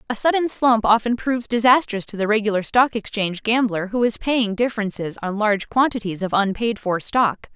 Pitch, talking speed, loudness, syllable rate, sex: 220 Hz, 185 wpm, -20 LUFS, 5.5 syllables/s, female